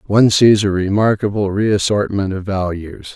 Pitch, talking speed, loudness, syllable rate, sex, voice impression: 100 Hz, 135 wpm, -15 LUFS, 4.7 syllables/s, male, very masculine, adult-like, thick, cool, sincere, calm, slightly wild